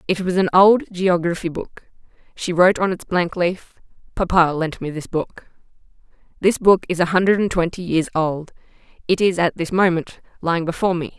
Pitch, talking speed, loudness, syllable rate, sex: 175 Hz, 180 wpm, -19 LUFS, 5.3 syllables/s, female